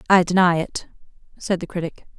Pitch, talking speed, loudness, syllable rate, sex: 175 Hz, 165 wpm, -21 LUFS, 5.7 syllables/s, female